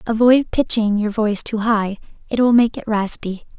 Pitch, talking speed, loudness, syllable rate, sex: 220 Hz, 165 wpm, -17 LUFS, 4.9 syllables/s, female